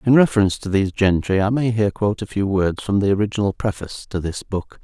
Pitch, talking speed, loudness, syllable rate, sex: 100 Hz, 235 wpm, -20 LUFS, 6.6 syllables/s, male